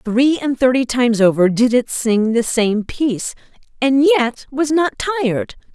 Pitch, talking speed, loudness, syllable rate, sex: 250 Hz, 165 wpm, -16 LUFS, 4.3 syllables/s, female